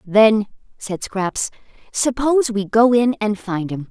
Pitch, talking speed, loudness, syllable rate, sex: 215 Hz, 155 wpm, -18 LUFS, 3.9 syllables/s, female